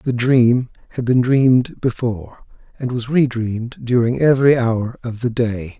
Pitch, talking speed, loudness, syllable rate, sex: 120 Hz, 165 wpm, -17 LUFS, 4.6 syllables/s, male